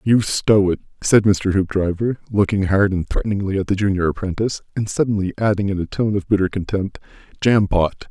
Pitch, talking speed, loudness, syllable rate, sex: 100 Hz, 170 wpm, -19 LUFS, 5.7 syllables/s, male